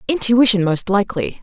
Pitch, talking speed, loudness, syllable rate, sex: 210 Hz, 125 wpm, -16 LUFS, 5.5 syllables/s, female